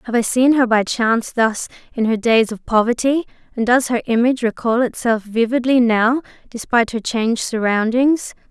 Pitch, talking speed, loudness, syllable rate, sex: 235 Hz, 170 wpm, -17 LUFS, 5.2 syllables/s, female